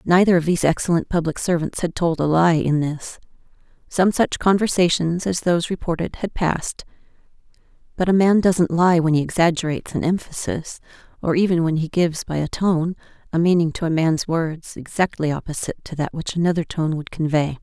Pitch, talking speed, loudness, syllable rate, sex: 170 Hz, 175 wpm, -20 LUFS, 5.6 syllables/s, female